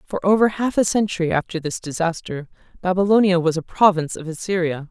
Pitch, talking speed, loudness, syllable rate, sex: 180 Hz, 170 wpm, -20 LUFS, 6.1 syllables/s, female